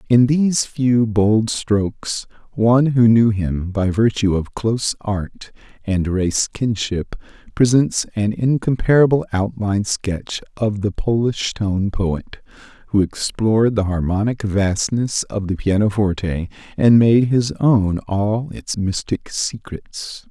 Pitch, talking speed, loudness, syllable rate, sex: 110 Hz, 125 wpm, -18 LUFS, 3.7 syllables/s, male